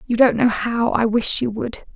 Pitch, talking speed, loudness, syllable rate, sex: 230 Hz, 245 wpm, -19 LUFS, 4.6 syllables/s, female